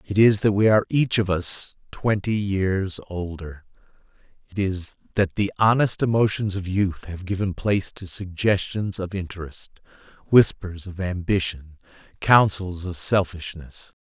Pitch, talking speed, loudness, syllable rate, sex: 95 Hz, 135 wpm, -23 LUFS, 4.4 syllables/s, male